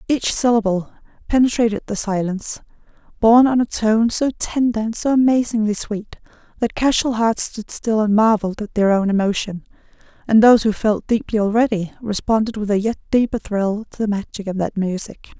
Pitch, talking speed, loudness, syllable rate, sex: 215 Hz, 170 wpm, -18 LUFS, 5.5 syllables/s, female